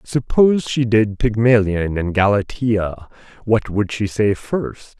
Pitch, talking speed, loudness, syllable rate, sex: 110 Hz, 130 wpm, -18 LUFS, 3.8 syllables/s, male